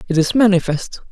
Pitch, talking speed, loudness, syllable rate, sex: 200 Hz, 160 wpm, -16 LUFS, 5.6 syllables/s, female